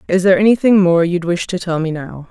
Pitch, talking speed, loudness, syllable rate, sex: 180 Hz, 260 wpm, -14 LUFS, 6.1 syllables/s, female